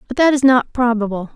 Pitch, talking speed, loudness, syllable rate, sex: 240 Hz, 220 wpm, -16 LUFS, 6.0 syllables/s, female